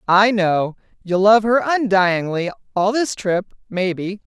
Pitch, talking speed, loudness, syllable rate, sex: 200 Hz, 140 wpm, -18 LUFS, 3.8 syllables/s, female